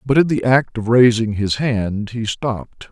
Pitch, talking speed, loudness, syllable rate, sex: 115 Hz, 205 wpm, -17 LUFS, 4.3 syllables/s, male